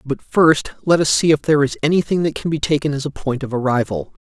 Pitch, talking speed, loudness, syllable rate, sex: 145 Hz, 255 wpm, -18 LUFS, 6.2 syllables/s, male